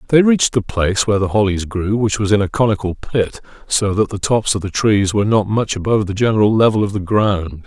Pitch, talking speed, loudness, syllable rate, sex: 105 Hz, 245 wpm, -16 LUFS, 6.0 syllables/s, male